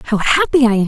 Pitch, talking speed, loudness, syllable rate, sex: 215 Hz, 275 wpm, -14 LUFS, 5.7 syllables/s, female